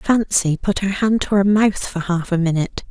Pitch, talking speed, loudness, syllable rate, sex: 190 Hz, 230 wpm, -18 LUFS, 4.9 syllables/s, female